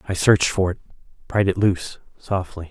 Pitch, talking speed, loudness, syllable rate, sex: 95 Hz, 175 wpm, -21 LUFS, 5.8 syllables/s, male